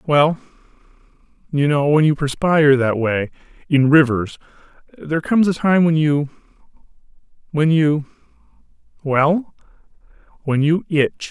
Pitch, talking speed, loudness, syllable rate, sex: 150 Hz, 105 wpm, -17 LUFS, 4.5 syllables/s, male